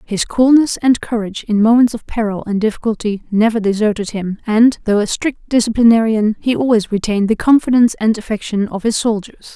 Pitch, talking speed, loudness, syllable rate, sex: 220 Hz, 175 wpm, -15 LUFS, 5.7 syllables/s, female